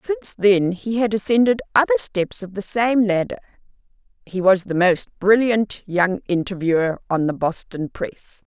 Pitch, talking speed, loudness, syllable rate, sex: 200 Hz, 155 wpm, -20 LUFS, 4.6 syllables/s, female